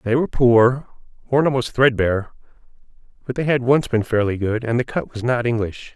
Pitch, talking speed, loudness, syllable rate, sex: 120 Hz, 190 wpm, -19 LUFS, 5.6 syllables/s, male